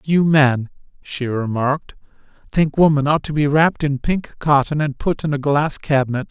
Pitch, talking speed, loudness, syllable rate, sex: 145 Hz, 180 wpm, -18 LUFS, 4.9 syllables/s, male